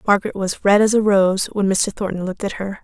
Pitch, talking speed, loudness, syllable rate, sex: 200 Hz, 255 wpm, -18 LUFS, 6.0 syllables/s, female